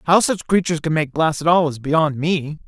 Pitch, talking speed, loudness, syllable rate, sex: 160 Hz, 245 wpm, -18 LUFS, 5.3 syllables/s, male